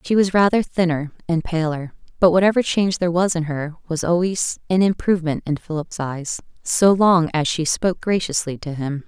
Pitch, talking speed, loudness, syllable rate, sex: 170 Hz, 185 wpm, -20 LUFS, 5.3 syllables/s, female